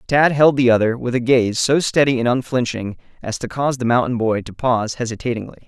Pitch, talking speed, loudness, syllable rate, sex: 125 Hz, 210 wpm, -18 LUFS, 6.0 syllables/s, male